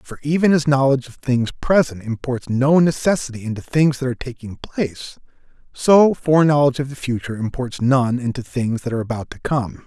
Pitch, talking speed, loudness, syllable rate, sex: 130 Hz, 185 wpm, -19 LUFS, 5.7 syllables/s, male